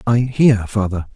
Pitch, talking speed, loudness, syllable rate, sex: 110 Hz, 155 wpm, -17 LUFS, 4.2 syllables/s, male